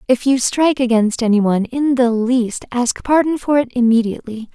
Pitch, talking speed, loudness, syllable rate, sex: 245 Hz, 185 wpm, -16 LUFS, 5.4 syllables/s, female